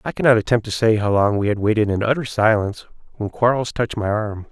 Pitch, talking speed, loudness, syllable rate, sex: 110 Hz, 240 wpm, -19 LUFS, 6.4 syllables/s, male